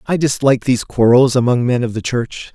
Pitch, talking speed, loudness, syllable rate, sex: 125 Hz, 210 wpm, -15 LUFS, 5.8 syllables/s, male